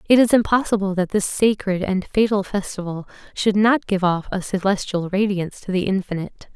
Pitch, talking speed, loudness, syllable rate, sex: 195 Hz, 175 wpm, -20 LUFS, 5.5 syllables/s, female